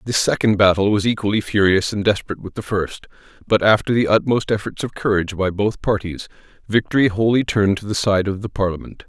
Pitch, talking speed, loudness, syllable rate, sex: 105 Hz, 200 wpm, -19 LUFS, 6.1 syllables/s, male